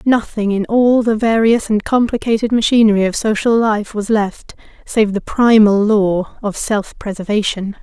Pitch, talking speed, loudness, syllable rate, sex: 215 Hz, 155 wpm, -15 LUFS, 4.5 syllables/s, female